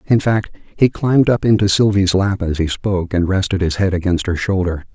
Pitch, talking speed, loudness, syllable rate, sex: 95 Hz, 220 wpm, -16 LUFS, 5.4 syllables/s, male